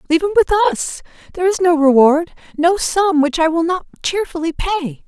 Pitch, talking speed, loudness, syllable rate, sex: 335 Hz, 190 wpm, -16 LUFS, 6.2 syllables/s, female